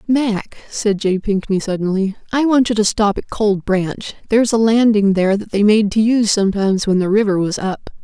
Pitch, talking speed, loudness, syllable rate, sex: 210 Hz, 210 wpm, -16 LUFS, 5.3 syllables/s, female